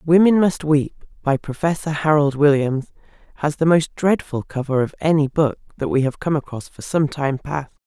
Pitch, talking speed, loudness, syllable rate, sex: 150 Hz, 185 wpm, -19 LUFS, 4.9 syllables/s, female